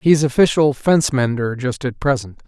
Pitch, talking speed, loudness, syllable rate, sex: 135 Hz, 170 wpm, -17 LUFS, 5.0 syllables/s, male